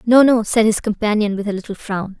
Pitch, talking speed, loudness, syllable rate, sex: 215 Hz, 245 wpm, -17 LUFS, 5.7 syllables/s, female